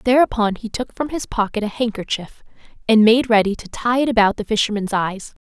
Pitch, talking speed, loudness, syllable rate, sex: 220 Hz, 195 wpm, -19 LUFS, 5.6 syllables/s, female